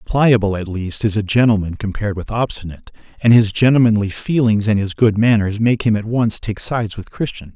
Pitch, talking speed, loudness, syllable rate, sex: 110 Hz, 200 wpm, -17 LUFS, 5.6 syllables/s, male